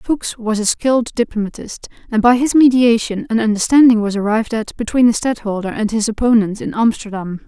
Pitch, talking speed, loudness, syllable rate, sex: 225 Hz, 175 wpm, -16 LUFS, 5.6 syllables/s, female